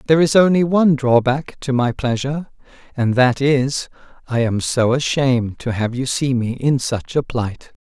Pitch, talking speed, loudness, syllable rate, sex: 130 Hz, 185 wpm, -18 LUFS, 4.8 syllables/s, male